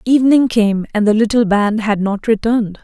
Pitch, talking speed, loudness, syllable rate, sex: 220 Hz, 190 wpm, -14 LUFS, 5.3 syllables/s, female